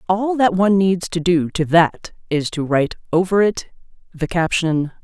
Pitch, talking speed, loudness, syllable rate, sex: 175 Hz, 180 wpm, -18 LUFS, 4.7 syllables/s, female